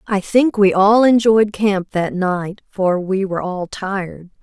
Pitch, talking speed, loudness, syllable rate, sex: 195 Hz, 175 wpm, -16 LUFS, 3.9 syllables/s, female